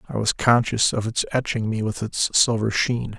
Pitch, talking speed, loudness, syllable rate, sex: 115 Hz, 205 wpm, -21 LUFS, 4.8 syllables/s, male